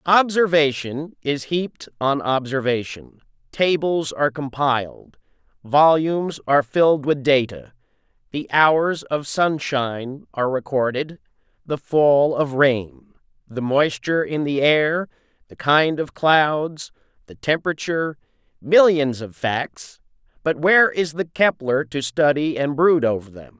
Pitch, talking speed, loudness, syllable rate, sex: 145 Hz, 120 wpm, -20 LUFS, 4.1 syllables/s, male